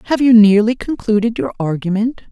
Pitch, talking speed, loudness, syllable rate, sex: 215 Hz, 155 wpm, -14 LUFS, 5.6 syllables/s, female